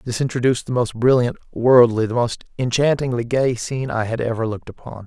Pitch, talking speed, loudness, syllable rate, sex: 120 Hz, 190 wpm, -19 LUFS, 5.9 syllables/s, male